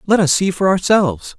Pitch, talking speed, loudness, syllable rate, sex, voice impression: 180 Hz, 215 wpm, -15 LUFS, 5.6 syllables/s, male, masculine, adult-like, tensed, slightly powerful, clear, fluent, intellectual, sincere, friendly, slightly wild, lively, slightly strict, slightly sharp